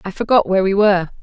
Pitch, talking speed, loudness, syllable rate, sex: 195 Hz, 245 wpm, -15 LUFS, 7.6 syllables/s, female